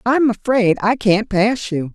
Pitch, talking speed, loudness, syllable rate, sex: 220 Hz, 185 wpm, -17 LUFS, 3.9 syllables/s, female